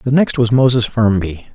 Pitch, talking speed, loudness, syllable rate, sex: 120 Hz, 195 wpm, -14 LUFS, 5.3 syllables/s, male